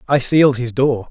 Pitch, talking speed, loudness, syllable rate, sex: 130 Hz, 215 wpm, -15 LUFS, 5.3 syllables/s, male